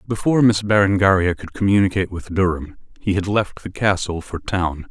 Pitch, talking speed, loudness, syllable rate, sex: 95 Hz, 170 wpm, -19 LUFS, 5.6 syllables/s, male